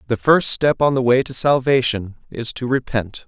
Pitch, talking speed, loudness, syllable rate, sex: 125 Hz, 200 wpm, -18 LUFS, 4.8 syllables/s, male